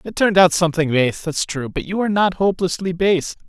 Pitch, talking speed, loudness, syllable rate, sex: 175 Hz, 225 wpm, -18 LUFS, 6.1 syllables/s, male